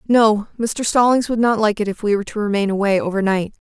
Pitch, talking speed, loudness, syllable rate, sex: 215 Hz, 245 wpm, -18 LUFS, 6.0 syllables/s, female